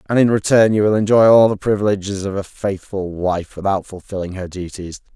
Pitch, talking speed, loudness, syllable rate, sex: 100 Hz, 200 wpm, -17 LUFS, 5.6 syllables/s, male